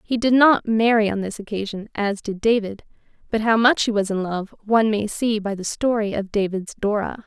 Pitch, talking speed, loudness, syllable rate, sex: 215 Hz, 215 wpm, -21 LUFS, 5.2 syllables/s, female